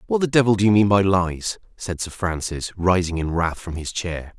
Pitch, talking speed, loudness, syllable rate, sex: 95 Hz, 235 wpm, -21 LUFS, 5.0 syllables/s, male